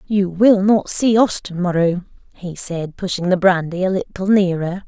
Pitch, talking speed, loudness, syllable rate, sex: 185 Hz, 170 wpm, -17 LUFS, 4.6 syllables/s, female